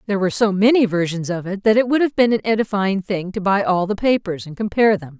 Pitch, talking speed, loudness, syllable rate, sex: 200 Hz, 265 wpm, -18 LUFS, 6.4 syllables/s, female